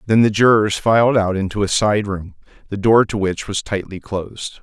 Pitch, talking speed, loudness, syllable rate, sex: 105 Hz, 210 wpm, -17 LUFS, 5.0 syllables/s, male